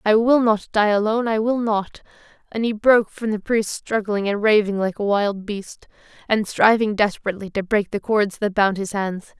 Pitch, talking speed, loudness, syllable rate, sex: 210 Hz, 200 wpm, -20 LUFS, 5.1 syllables/s, female